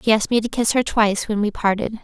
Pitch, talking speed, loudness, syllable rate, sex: 215 Hz, 295 wpm, -19 LUFS, 6.7 syllables/s, female